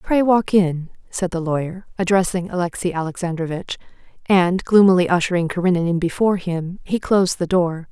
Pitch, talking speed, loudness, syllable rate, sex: 180 Hz, 150 wpm, -19 LUFS, 5.4 syllables/s, female